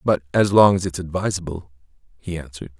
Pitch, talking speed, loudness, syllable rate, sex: 85 Hz, 170 wpm, -20 LUFS, 6.2 syllables/s, male